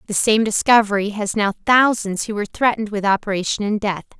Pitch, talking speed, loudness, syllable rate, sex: 210 Hz, 185 wpm, -18 LUFS, 6.1 syllables/s, female